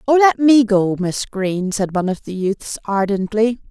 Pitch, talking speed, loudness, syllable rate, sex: 210 Hz, 195 wpm, -17 LUFS, 4.7 syllables/s, female